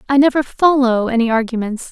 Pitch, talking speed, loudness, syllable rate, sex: 250 Hz, 155 wpm, -15 LUFS, 5.8 syllables/s, female